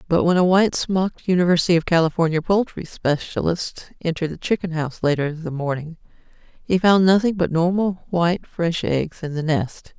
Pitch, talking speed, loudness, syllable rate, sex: 170 Hz, 175 wpm, -20 LUFS, 5.6 syllables/s, female